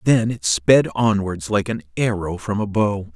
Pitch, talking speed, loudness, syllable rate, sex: 105 Hz, 190 wpm, -20 LUFS, 4.3 syllables/s, male